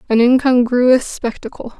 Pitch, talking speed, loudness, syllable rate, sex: 245 Hz, 100 wpm, -14 LUFS, 4.4 syllables/s, female